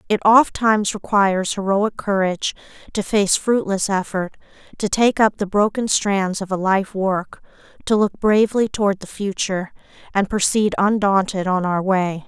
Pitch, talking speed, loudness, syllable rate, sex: 200 Hz, 150 wpm, -19 LUFS, 4.7 syllables/s, female